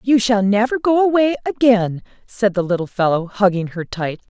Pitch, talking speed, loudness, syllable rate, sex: 220 Hz, 175 wpm, -17 LUFS, 5.0 syllables/s, female